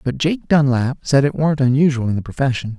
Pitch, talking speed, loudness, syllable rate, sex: 135 Hz, 215 wpm, -17 LUFS, 5.6 syllables/s, male